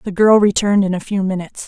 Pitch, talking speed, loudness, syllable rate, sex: 200 Hz, 250 wpm, -15 LUFS, 7.0 syllables/s, female